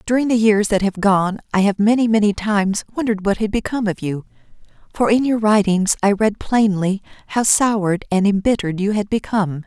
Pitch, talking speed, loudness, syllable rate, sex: 205 Hz, 190 wpm, -18 LUFS, 5.7 syllables/s, female